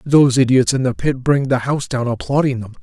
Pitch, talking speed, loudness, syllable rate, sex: 130 Hz, 235 wpm, -17 LUFS, 6.0 syllables/s, male